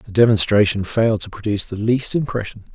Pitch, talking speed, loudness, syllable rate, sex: 110 Hz, 175 wpm, -18 LUFS, 6.1 syllables/s, male